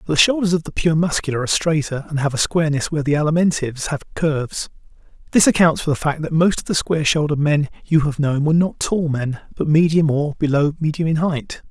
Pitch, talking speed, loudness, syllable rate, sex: 155 Hz, 225 wpm, -19 LUFS, 6.3 syllables/s, male